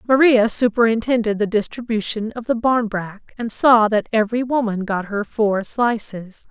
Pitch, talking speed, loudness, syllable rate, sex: 220 Hz, 150 wpm, -19 LUFS, 4.8 syllables/s, female